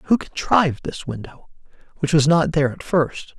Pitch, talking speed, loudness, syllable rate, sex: 155 Hz, 175 wpm, -20 LUFS, 5.0 syllables/s, male